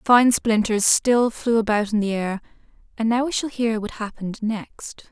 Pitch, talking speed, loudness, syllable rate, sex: 220 Hz, 200 wpm, -21 LUFS, 4.7 syllables/s, female